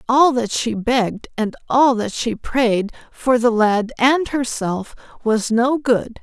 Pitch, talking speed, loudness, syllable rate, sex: 235 Hz, 165 wpm, -18 LUFS, 3.5 syllables/s, female